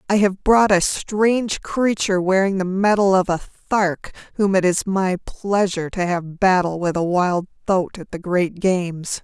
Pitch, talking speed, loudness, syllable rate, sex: 190 Hz, 180 wpm, -19 LUFS, 4.4 syllables/s, female